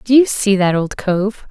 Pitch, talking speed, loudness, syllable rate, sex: 205 Hz, 240 wpm, -15 LUFS, 4.3 syllables/s, female